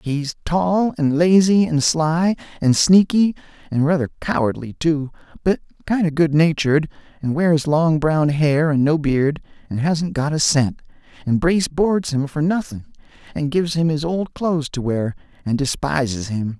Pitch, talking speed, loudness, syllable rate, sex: 155 Hz, 165 wpm, -19 LUFS, 4.5 syllables/s, male